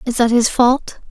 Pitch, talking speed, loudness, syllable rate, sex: 245 Hz, 220 wpm, -15 LUFS, 4.4 syllables/s, female